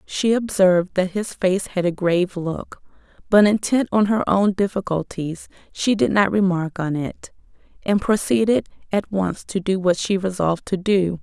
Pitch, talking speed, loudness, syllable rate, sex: 190 Hz, 170 wpm, -20 LUFS, 4.6 syllables/s, female